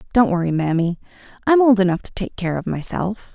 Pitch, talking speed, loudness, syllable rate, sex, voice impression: 195 Hz, 195 wpm, -19 LUFS, 5.7 syllables/s, female, feminine, adult-like, soft, slightly sincere, calm, friendly, kind